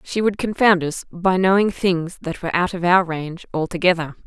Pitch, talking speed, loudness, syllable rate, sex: 175 Hz, 195 wpm, -19 LUFS, 5.4 syllables/s, female